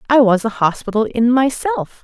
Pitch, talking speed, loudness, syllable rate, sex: 240 Hz, 175 wpm, -16 LUFS, 4.9 syllables/s, female